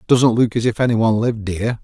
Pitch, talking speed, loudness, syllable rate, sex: 115 Hz, 260 wpm, -17 LUFS, 7.1 syllables/s, male